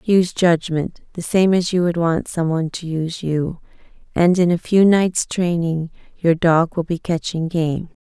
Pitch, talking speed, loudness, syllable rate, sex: 170 Hz, 185 wpm, -19 LUFS, 4.5 syllables/s, female